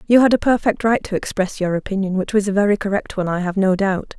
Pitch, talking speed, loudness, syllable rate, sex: 200 Hz, 275 wpm, -19 LUFS, 6.5 syllables/s, female